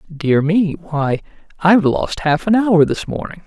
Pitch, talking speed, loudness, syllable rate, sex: 170 Hz, 155 wpm, -16 LUFS, 4.4 syllables/s, male